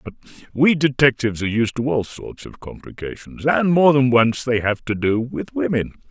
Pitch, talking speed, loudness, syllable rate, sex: 125 Hz, 195 wpm, -19 LUFS, 5.1 syllables/s, male